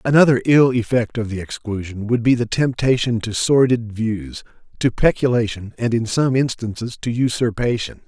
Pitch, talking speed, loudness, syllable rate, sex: 115 Hz, 155 wpm, -19 LUFS, 4.9 syllables/s, male